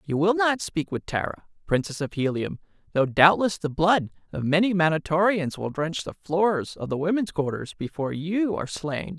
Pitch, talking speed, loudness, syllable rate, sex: 165 Hz, 185 wpm, -25 LUFS, 5.0 syllables/s, male